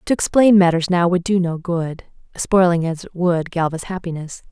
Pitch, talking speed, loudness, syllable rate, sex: 175 Hz, 185 wpm, -18 LUFS, 4.9 syllables/s, female